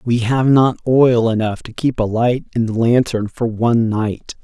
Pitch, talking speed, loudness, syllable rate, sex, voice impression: 115 Hz, 205 wpm, -16 LUFS, 4.3 syllables/s, male, masculine, adult-like, tensed, powerful, slightly muffled, raspy, intellectual, mature, friendly, wild, lively, slightly strict